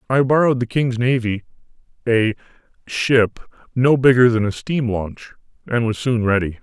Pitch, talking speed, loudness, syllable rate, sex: 120 Hz, 135 wpm, -18 LUFS, 4.8 syllables/s, male